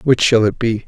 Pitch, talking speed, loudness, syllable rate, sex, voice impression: 115 Hz, 275 wpm, -15 LUFS, 5.3 syllables/s, male, very masculine, very adult-like, old, thick, relaxed, slightly weak, slightly dark, soft, muffled, slightly halting, raspy, cool, intellectual, sincere, very calm, very mature, friendly, reassuring, unique, elegant, slightly wild, slightly sweet, slightly lively, very kind, very modest